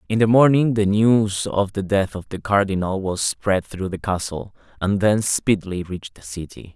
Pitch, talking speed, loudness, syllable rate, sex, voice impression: 100 Hz, 195 wpm, -20 LUFS, 5.0 syllables/s, male, masculine, slightly middle-aged, slightly thick, slightly mature, elegant